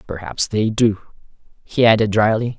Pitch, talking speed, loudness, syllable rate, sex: 110 Hz, 140 wpm, -17 LUFS, 5.0 syllables/s, male